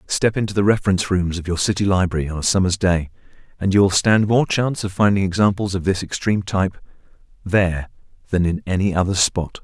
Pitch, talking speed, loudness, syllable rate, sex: 95 Hz, 200 wpm, -19 LUFS, 6.3 syllables/s, male